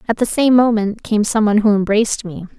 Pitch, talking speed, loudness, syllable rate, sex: 215 Hz, 210 wpm, -15 LUFS, 6.0 syllables/s, female